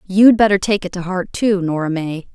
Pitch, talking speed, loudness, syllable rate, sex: 185 Hz, 230 wpm, -16 LUFS, 5.1 syllables/s, female